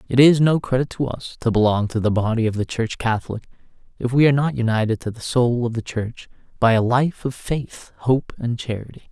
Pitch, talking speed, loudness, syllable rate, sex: 120 Hz, 225 wpm, -20 LUFS, 5.6 syllables/s, male